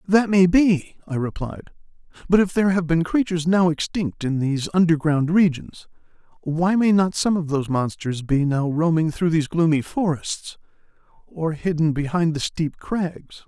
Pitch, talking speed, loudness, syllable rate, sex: 165 Hz, 165 wpm, -21 LUFS, 4.8 syllables/s, male